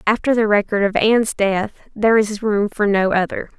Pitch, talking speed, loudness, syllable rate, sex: 210 Hz, 200 wpm, -17 LUFS, 5.1 syllables/s, female